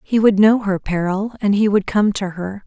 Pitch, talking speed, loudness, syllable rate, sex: 205 Hz, 250 wpm, -17 LUFS, 4.8 syllables/s, female